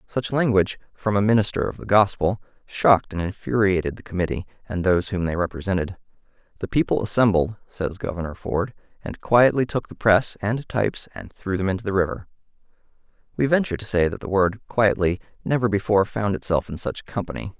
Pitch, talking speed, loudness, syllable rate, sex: 100 Hz, 175 wpm, -22 LUFS, 5.9 syllables/s, male